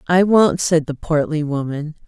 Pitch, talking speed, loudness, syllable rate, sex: 160 Hz, 175 wpm, -18 LUFS, 4.3 syllables/s, female